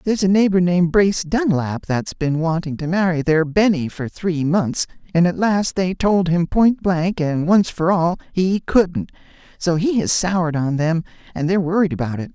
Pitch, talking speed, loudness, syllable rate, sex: 175 Hz, 200 wpm, -19 LUFS, 4.8 syllables/s, male